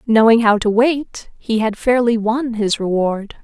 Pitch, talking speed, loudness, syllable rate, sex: 225 Hz, 175 wpm, -16 LUFS, 4.0 syllables/s, female